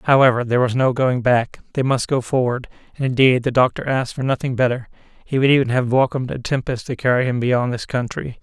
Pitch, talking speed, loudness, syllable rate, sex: 125 Hz, 220 wpm, -19 LUFS, 6.1 syllables/s, male